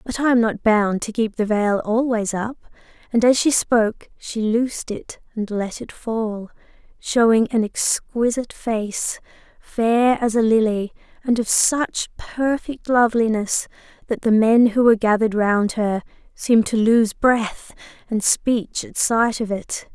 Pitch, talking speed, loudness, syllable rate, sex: 225 Hz, 160 wpm, -20 LUFS, 4.1 syllables/s, female